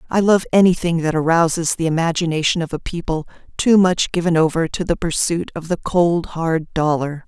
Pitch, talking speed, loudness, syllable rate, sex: 165 Hz, 180 wpm, -18 LUFS, 5.3 syllables/s, female